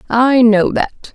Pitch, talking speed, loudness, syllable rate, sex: 235 Hz, 155 wpm, -13 LUFS, 3.2 syllables/s, female